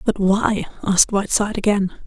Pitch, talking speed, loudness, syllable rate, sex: 205 Hz, 145 wpm, -19 LUFS, 5.8 syllables/s, female